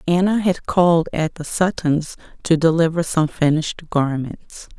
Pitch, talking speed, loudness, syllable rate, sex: 165 Hz, 140 wpm, -19 LUFS, 4.5 syllables/s, female